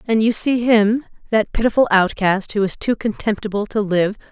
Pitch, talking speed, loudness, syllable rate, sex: 215 Hz, 180 wpm, -18 LUFS, 5.0 syllables/s, female